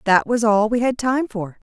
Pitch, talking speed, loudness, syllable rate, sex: 225 Hz, 240 wpm, -19 LUFS, 4.7 syllables/s, female